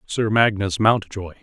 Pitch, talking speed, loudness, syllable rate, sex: 105 Hz, 125 wpm, -19 LUFS, 4.0 syllables/s, male